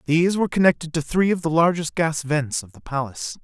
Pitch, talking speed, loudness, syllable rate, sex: 160 Hz, 225 wpm, -21 LUFS, 6.2 syllables/s, male